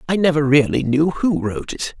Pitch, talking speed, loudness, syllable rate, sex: 145 Hz, 210 wpm, -18 LUFS, 5.5 syllables/s, male